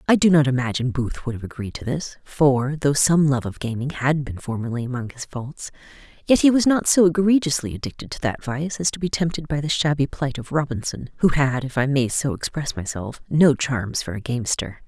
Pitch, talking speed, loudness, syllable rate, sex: 140 Hz, 220 wpm, -22 LUFS, 5.5 syllables/s, female